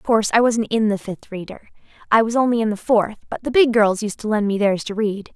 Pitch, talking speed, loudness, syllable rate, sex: 215 Hz, 260 wpm, -19 LUFS, 5.9 syllables/s, female